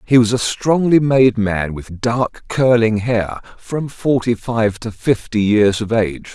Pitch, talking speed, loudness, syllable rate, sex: 115 Hz, 170 wpm, -17 LUFS, 3.8 syllables/s, male